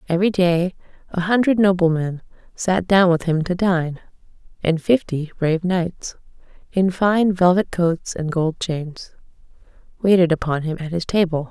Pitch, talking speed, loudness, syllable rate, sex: 175 Hz, 150 wpm, -19 LUFS, 4.6 syllables/s, female